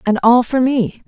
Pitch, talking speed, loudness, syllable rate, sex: 235 Hz, 225 wpm, -14 LUFS, 4.3 syllables/s, female